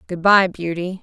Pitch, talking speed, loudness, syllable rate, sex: 180 Hz, 175 wpm, -17 LUFS, 4.6 syllables/s, female